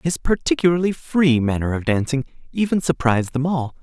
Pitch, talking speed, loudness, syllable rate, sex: 150 Hz, 155 wpm, -20 LUFS, 5.5 syllables/s, male